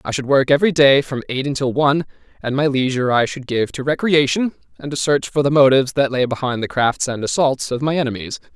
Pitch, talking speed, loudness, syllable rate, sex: 135 Hz, 230 wpm, -18 LUFS, 6.1 syllables/s, male